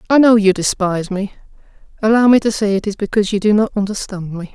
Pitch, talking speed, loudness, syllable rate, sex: 205 Hz, 225 wpm, -15 LUFS, 6.6 syllables/s, female